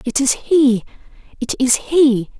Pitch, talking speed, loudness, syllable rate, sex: 260 Hz, 150 wpm, -16 LUFS, 3.8 syllables/s, female